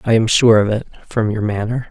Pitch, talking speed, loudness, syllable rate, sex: 110 Hz, 250 wpm, -16 LUFS, 5.6 syllables/s, male